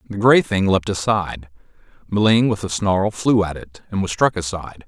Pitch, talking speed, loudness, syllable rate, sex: 100 Hz, 195 wpm, -19 LUFS, 5.0 syllables/s, male